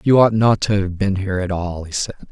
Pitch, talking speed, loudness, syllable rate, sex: 100 Hz, 285 wpm, -18 LUFS, 5.9 syllables/s, male